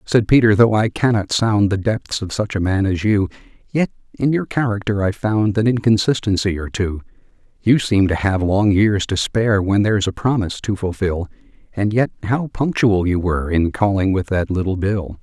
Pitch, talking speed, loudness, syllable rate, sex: 100 Hz, 195 wpm, -18 LUFS, 5.1 syllables/s, male